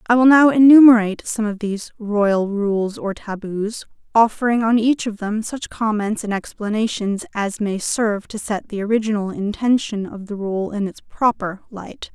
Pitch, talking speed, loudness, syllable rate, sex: 215 Hz, 175 wpm, -19 LUFS, 4.7 syllables/s, female